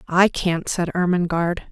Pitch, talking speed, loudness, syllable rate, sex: 175 Hz, 140 wpm, -21 LUFS, 4.6 syllables/s, female